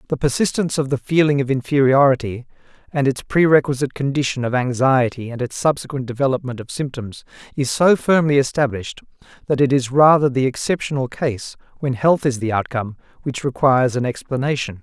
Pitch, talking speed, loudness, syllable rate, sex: 135 Hz, 160 wpm, -19 LUFS, 5.9 syllables/s, male